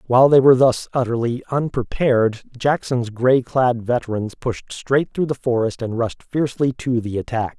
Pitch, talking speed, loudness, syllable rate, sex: 125 Hz, 165 wpm, -19 LUFS, 4.9 syllables/s, male